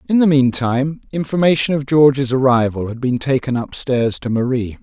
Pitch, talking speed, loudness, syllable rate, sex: 130 Hz, 175 wpm, -17 LUFS, 5.1 syllables/s, male